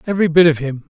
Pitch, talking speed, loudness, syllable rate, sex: 165 Hz, 250 wpm, -14 LUFS, 8.0 syllables/s, male